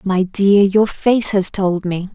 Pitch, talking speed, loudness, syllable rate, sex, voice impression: 195 Hz, 195 wpm, -16 LUFS, 3.5 syllables/s, female, feminine, adult-like, slightly relaxed, slightly weak, soft, slightly raspy, friendly, reassuring, elegant, kind, modest